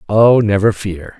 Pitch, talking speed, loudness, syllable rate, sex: 105 Hz, 150 wpm, -13 LUFS, 4.0 syllables/s, male